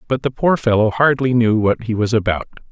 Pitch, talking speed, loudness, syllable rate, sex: 115 Hz, 220 wpm, -17 LUFS, 5.7 syllables/s, male